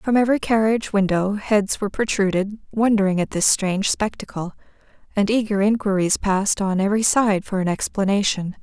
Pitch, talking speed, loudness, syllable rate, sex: 205 Hz, 155 wpm, -20 LUFS, 5.6 syllables/s, female